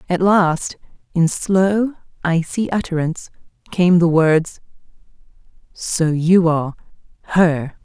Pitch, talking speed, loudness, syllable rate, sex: 170 Hz, 90 wpm, -17 LUFS, 3.7 syllables/s, female